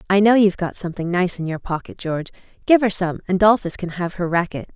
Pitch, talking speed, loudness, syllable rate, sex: 185 Hz, 240 wpm, -20 LUFS, 6.3 syllables/s, female